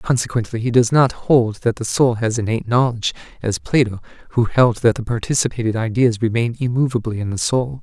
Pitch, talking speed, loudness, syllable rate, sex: 120 Hz, 185 wpm, -18 LUFS, 5.7 syllables/s, male